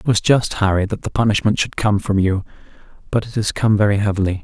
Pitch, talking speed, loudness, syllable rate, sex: 105 Hz, 230 wpm, -18 LUFS, 6.2 syllables/s, male